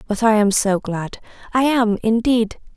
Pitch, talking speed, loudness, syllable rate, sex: 220 Hz, 175 wpm, -18 LUFS, 4.3 syllables/s, female